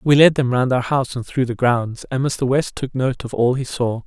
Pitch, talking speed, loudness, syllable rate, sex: 125 Hz, 280 wpm, -19 LUFS, 5.0 syllables/s, male